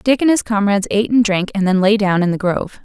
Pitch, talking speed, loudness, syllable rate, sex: 205 Hz, 295 wpm, -16 LUFS, 6.5 syllables/s, female